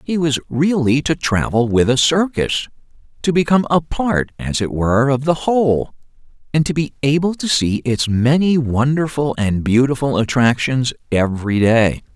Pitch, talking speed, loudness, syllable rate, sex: 135 Hz, 160 wpm, -17 LUFS, 4.7 syllables/s, male